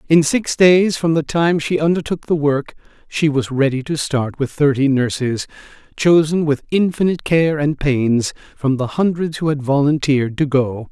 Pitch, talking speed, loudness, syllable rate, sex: 150 Hz, 175 wpm, -17 LUFS, 4.7 syllables/s, male